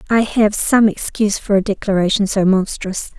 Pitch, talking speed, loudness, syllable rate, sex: 205 Hz, 170 wpm, -16 LUFS, 5.1 syllables/s, female